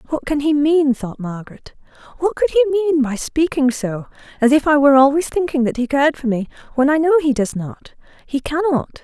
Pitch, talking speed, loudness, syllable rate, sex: 270 Hz, 205 wpm, -17 LUFS, 6.4 syllables/s, female